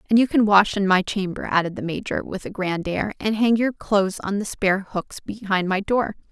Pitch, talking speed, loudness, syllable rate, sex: 200 Hz, 235 wpm, -22 LUFS, 5.3 syllables/s, female